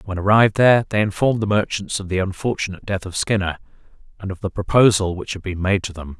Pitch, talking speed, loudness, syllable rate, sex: 100 Hz, 225 wpm, -19 LUFS, 6.6 syllables/s, male